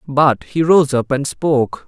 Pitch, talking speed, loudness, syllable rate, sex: 145 Hz, 190 wpm, -16 LUFS, 4.2 syllables/s, male